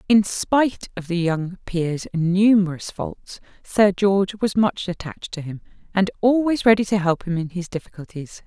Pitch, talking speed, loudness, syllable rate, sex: 190 Hz, 170 wpm, -21 LUFS, 4.7 syllables/s, female